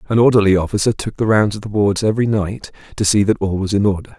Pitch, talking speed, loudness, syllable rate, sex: 105 Hz, 260 wpm, -16 LUFS, 6.7 syllables/s, male